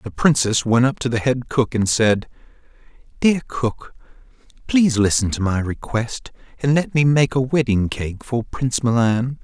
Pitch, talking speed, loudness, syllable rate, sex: 120 Hz, 170 wpm, -19 LUFS, 4.6 syllables/s, male